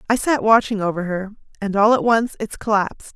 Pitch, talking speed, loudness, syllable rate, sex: 210 Hz, 210 wpm, -19 LUFS, 5.7 syllables/s, female